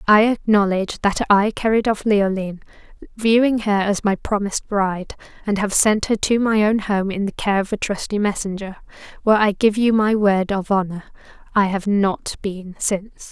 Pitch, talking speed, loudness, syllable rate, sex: 205 Hz, 185 wpm, -19 LUFS, 5.1 syllables/s, female